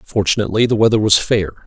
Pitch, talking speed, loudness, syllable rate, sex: 105 Hz, 180 wpm, -15 LUFS, 6.7 syllables/s, male